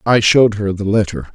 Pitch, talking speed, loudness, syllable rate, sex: 105 Hz, 225 wpm, -15 LUFS, 6.0 syllables/s, male